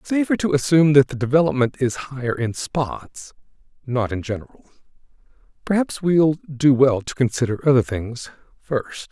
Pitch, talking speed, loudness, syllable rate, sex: 135 Hz, 145 wpm, -20 LUFS, 5.1 syllables/s, male